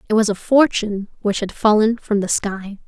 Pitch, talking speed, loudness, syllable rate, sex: 210 Hz, 210 wpm, -18 LUFS, 5.2 syllables/s, female